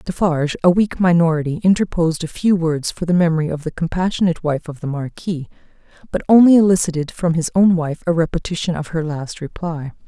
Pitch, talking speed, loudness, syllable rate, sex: 165 Hz, 185 wpm, -18 LUFS, 6.0 syllables/s, female